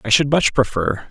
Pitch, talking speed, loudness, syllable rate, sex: 120 Hz, 215 wpm, -17 LUFS, 5.0 syllables/s, male